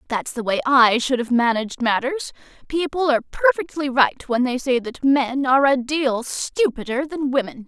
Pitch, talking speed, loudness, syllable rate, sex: 265 Hz, 180 wpm, -20 LUFS, 4.8 syllables/s, female